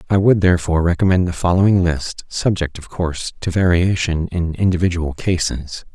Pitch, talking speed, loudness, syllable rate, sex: 85 Hz, 150 wpm, -18 LUFS, 5.4 syllables/s, male